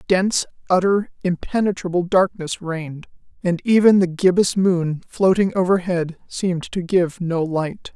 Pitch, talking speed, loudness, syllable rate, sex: 180 Hz, 130 wpm, -20 LUFS, 4.5 syllables/s, female